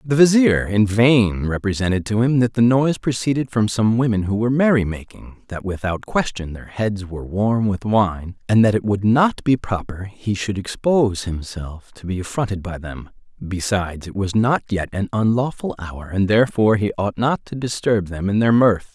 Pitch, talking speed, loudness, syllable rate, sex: 105 Hz, 195 wpm, -19 LUFS, 5.0 syllables/s, male